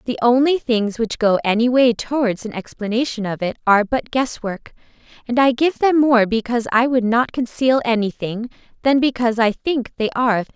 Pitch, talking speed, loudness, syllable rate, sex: 235 Hz, 200 wpm, -18 LUFS, 5.6 syllables/s, female